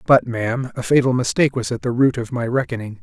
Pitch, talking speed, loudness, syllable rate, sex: 120 Hz, 240 wpm, -19 LUFS, 6.3 syllables/s, male